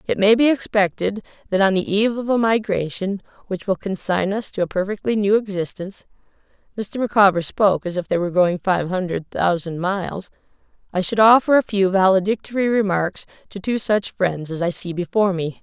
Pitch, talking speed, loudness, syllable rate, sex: 195 Hz, 185 wpm, -20 LUFS, 5.5 syllables/s, female